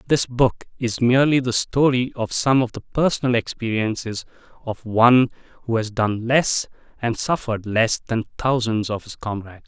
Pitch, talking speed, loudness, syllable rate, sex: 120 Hz, 160 wpm, -21 LUFS, 5.0 syllables/s, male